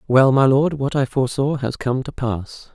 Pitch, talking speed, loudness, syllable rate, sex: 135 Hz, 220 wpm, -19 LUFS, 4.7 syllables/s, male